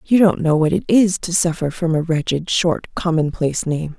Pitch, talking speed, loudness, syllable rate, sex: 165 Hz, 210 wpm, -18 LUFS, 5.0 syllables/s, female